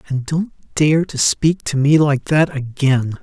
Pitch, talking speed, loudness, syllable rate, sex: 145 Hz, 185 wpm, -17 LUFS, 3.6 syllables/s, male